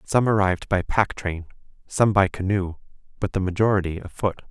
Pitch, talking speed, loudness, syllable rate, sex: 95 Hz, 160 wpm, -23 LUFS, 5.4 syllables/s, male